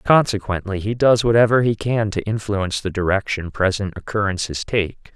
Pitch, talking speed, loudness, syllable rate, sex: 105 Hz, 150 wpm, -20 LUFS, 5.2 syllables/s, male